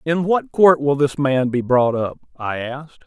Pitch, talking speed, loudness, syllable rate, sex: 140 Hz, 215 wpm, -18 LUFS, 4.6 syllables/s, male